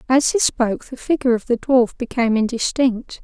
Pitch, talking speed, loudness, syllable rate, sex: 245 Hz, 185 wpm, -19 LUFS, 5.6 syllables/s, female